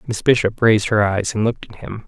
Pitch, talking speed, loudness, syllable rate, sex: 110 Hz, 260 wpm, -17 LUFS, 6.3 syllables/s, male